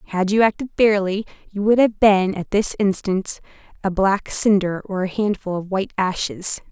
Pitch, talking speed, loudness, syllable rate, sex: 200 Hz, 180 wpm, -20 LUFS, 4.9 syllables/s, female